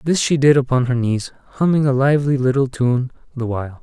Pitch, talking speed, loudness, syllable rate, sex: 135 Hz, 205 wpm, -18 LUFS, 6.0 syllables/s, male